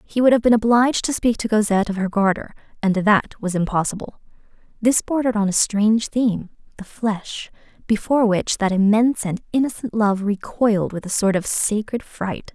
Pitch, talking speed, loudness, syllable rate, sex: 215 Hz, 180 wpm, -20 LUFS, 5.5 syllables/s, female